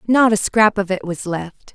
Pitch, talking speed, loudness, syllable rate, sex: 200 Hz, 240 wpm, -18 LUFS, 4.4 syllables/s, female